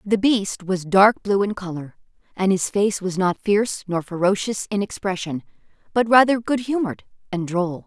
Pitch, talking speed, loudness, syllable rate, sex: 200 Hz, 175 wpm, -21 LUFS, 4.9 syllables/s, female